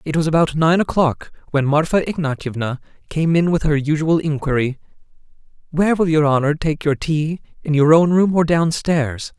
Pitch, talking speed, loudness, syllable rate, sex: 155 Hz, 175 wpm, -18 LUFS, 5.1 syllables/s, male